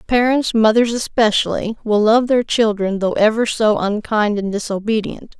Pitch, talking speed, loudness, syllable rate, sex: 220 Hz, 145 wpm, -17 LUFS, 4.7 syllables/s, female